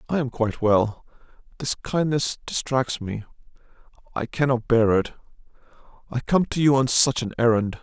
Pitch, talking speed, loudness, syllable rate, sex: 125 Hz, 140 wpm, -22 LUFS, 5.0 syllables/s, male